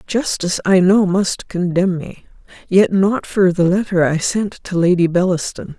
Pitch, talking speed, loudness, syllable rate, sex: 185 Hz, 155 wpm, -16 LUFS, 4.5 syllables/s, female